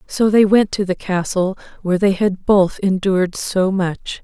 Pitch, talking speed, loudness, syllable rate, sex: 190 Hz, 185 wpm, -17 LUFS, 4.4 syllables/s, female